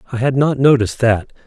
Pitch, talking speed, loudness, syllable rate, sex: 125 Hz, 205 wpm, -15 LUFS, 6.4 syllables/s, male